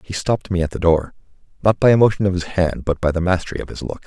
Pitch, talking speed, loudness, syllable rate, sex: 90 Hz, 280 wpm, -19 LUFS, 6.9 syllables/s, male